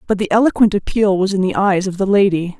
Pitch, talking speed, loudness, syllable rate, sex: 195 Hz, 255 wpm, -15 LUFS, 6.2 syllables/s, female